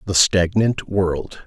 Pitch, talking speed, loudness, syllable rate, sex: 95 Hz, 125 wpm, -19 LUFS, 3.1 syllables/s, male